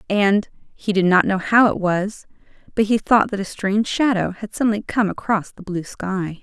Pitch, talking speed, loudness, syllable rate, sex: 200 Hz, 205 wpm, -20 LUFS, 5.0 syllables/s, female